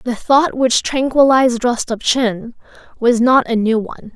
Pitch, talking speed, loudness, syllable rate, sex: 240 Hz, 145 wpm, -15 LUFS, 4.4 syllables/s, female